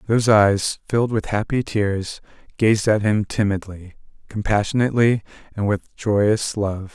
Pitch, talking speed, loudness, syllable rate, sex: 105 Hz, 130 wpm, -20 LUFS, 4.4 syllables/s, male